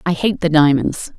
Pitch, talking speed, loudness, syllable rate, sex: 160 Hz, 200 wpm, -16 LUFS, 4.8 syllables/s, female